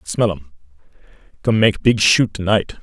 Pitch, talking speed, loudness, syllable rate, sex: 100 Hz, 150 wpm, -17 LUFS, 4.4 syllables/s, male